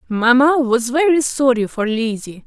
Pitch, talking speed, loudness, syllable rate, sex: 250 Hz, 145 wpm, -16 LUFS, 4.4 syllables/s, female